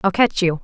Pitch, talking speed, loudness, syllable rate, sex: 190 Hz, 285 wpm, -17 LUFS, 5.7 syllables/s, female